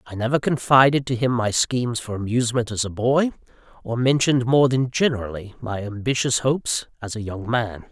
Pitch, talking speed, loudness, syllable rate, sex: 120 Hz, 180 wpm, -21 LUFS, 5.5 syllables/s, male